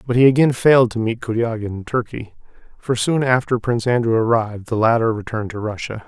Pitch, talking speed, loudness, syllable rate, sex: 115 Hz, 200 wpm, -18 LUFS, 6.2 syllables/s, male